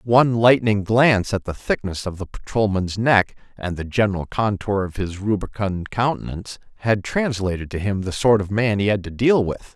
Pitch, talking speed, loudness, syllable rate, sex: 105 Hz, 190 wpm, -21 LUFS, 5.1 syllables/s, male